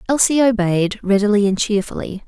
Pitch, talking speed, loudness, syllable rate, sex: 210 Hz, 130 wpm, -17 LUFS, 5.3 syllables/s, female